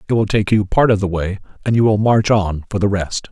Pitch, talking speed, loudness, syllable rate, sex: 100 Hz, 290 wpm, -17 LUFS, 5.7 syllables/s, male